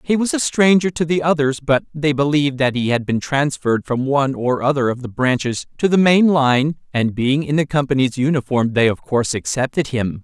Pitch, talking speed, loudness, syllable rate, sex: 140 Hz, 215 wpm, -18 LUFS, 5.4 syllables/s, male